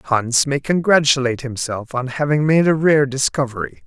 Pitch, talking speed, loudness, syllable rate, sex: 135 Hz, 155 wpm, -17 LUFS, 5.0 syllables/s, male